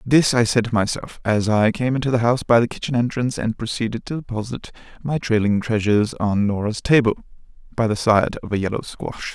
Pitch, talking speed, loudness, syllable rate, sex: 115 Hz, 205 wpm, -20 LUFS, 5.8 syllables/s, male